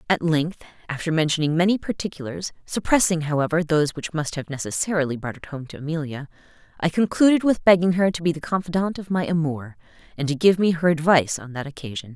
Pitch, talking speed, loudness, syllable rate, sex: 160 Hz, 190 wpm, -22 LUFS, 6.4 syllables/s, female